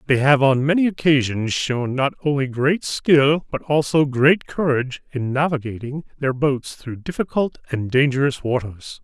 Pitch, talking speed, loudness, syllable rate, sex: 140 Hz, 155 wpm, -20 LUFS, 4.5 syllables/s, male